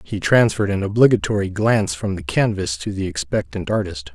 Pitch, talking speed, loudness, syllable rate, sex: 95 Hz, 175 wpm, -19 LUFS, 5.7 syllables/s, male